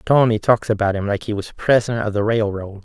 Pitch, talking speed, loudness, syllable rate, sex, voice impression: 110 Hz, 230 wpm, -19 LUFS, 5.9 syllables/s, male, very masculine, very adult-like, slightly old, very thick, slightly tensed, slightly powerful, slightly bright, slightly soft, slightly clear, slightly fluent, slightly cool, very intellectual, slightly refreshing, very sincere, very calm, mature, friendly, very reassuring, unique, elegant, slightly wild, slightly sweet, slightly lively, kind, slightly modest